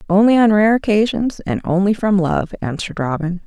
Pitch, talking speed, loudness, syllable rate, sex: 195 Hz, 175 wpm, -17 LUFS, 5.2 syllables/s, female